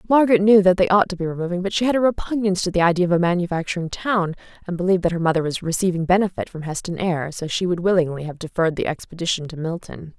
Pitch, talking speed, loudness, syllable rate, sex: 180 Hz, 240 wpm, -20 LUFS, 7.1 syllables/s, female